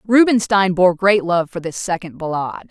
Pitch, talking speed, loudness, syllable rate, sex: 185 Hz, 175 wpm, -17 LUFS, 5.0 syllables/s, female